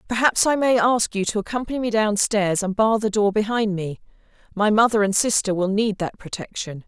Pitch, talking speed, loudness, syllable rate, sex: 210 Hz, 200 wpm, -21 LUFS, 5.4 syllables/s, female